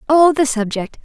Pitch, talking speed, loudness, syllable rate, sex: 270 Hz, 175 wpm, -15 LUFS, 4.8 syllables/s, female